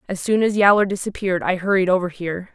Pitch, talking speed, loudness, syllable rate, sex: 190 Hz, 215 wpm, -19 LUFS, 6.8 syllables/s, female